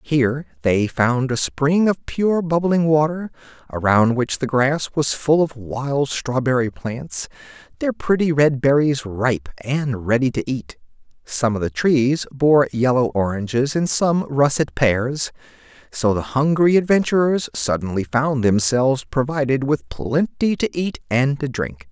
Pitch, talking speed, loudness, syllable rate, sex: 135 Hz, 150 wpm, -19 LUFS, 4.0 syllables/s, male